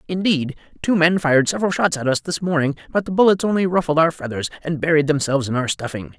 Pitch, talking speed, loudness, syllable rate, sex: 155 Hz, 225 wpm, -19 LUFS, 6.6 syllables/s, male